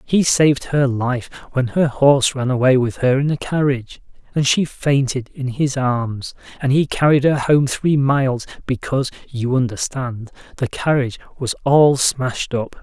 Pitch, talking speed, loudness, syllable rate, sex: 130 Hz, 170 wpm, -18 LUFS, 4.7 syllables/s, male